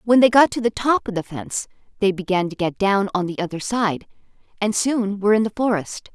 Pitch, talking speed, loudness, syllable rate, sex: 205 Hz, 235 wpm, -20 LUFS, 5.7 syllables/s, female